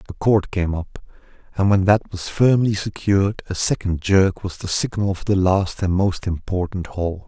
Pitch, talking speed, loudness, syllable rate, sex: 95 Hz, 190 wpm, -20 LUFS, 4.6 syllables/s, male